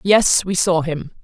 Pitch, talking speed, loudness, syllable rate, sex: 170 Hz, 195 wpm, -17 LUFS, 3.7 syllables/s, female